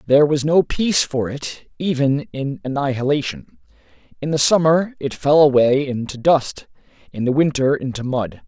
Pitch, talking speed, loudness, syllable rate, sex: 135 Hz, 155 wpm, -18 LUFS, 4.8 syllables/s, male